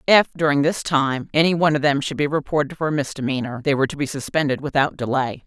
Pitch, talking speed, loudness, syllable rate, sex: 145 Hz, 230 wpm, -20 LUFS, 6.6 syllables/s, female